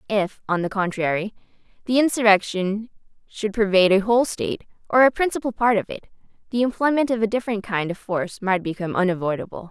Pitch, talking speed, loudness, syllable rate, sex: 205 Hz, 175 wpm, -21 LUFS, 6.4 syllables/s, female